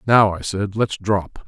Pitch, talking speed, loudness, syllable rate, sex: 100 Hz, 205 wpm, -20 LUFS, 3.8 syllables/s, male